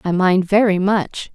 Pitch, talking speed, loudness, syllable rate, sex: 190 Hz, 180 wpm, -16 LUFS, 4.0 syllables/s, female